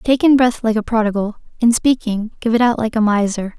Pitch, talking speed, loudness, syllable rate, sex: 225 Hz, 235 wpm, -16 LUFS, 5.6 syllables/s, female